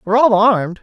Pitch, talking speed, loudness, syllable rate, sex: 215 Hz, 215 wpm, -13 LUFS, 6.9 syllables/s, male